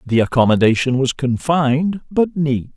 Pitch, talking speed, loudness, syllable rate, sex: 140 Hz, 130 wpm, -17 LUFS, 4.7 syllables/s, male